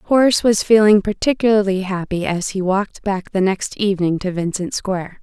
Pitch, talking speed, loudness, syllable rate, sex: 195 Hz, 170 wpm, -18 LUFS, 5.4 syllables/s, female